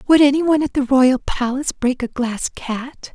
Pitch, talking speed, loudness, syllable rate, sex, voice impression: 265 Hz, 190 wpm, -18 LUFS, 4.7 syllables/s, female, feminine, adult-like, slightly powerful, slightly intellectual